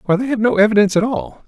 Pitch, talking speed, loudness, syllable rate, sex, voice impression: 210 Hz, 285 wpm, -16 LUFS, 7.6 syllables/s, male, very masculine, slightly middle-aged, slightly thick, slightly relaxed, powerful, bright, slightly soft, clear, very fluent, slightly raspy, cool, very intellectual, very refreshing, sincere, calm, slightly mature, slightly friendly, slightly reassuring, very unique, slightly elegant, wild, very sweet, very lively, kind, intense, slightly sharp, light